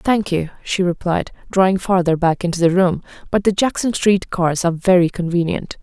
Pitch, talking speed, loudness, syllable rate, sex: 180 Hz, 185 wpm, -18 LUFS, 5.2 syllables/s, female